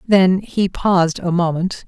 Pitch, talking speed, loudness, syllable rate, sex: 180 Hz, 160 wpm, -17 LUFS, 4.1 syllables/s, female